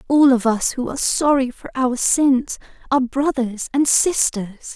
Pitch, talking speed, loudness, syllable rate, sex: 260 Hz, 165 wpm, -18 LUFS, 4.6 syllables/s, female